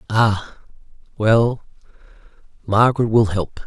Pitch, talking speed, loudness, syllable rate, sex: 110 Hz, 80 wpm, -18 LUFS, 3.6 syllables/s, male